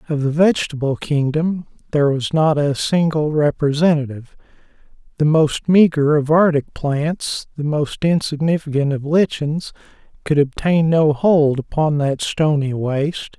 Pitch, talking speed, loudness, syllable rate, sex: 150 Hz, 130 wpm, -18 LUFS, 4.5 syllables/s, male